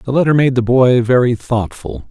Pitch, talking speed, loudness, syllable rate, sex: 125 Hz, 200 wpm, -14 LUFS, 4.9 syllables/s, male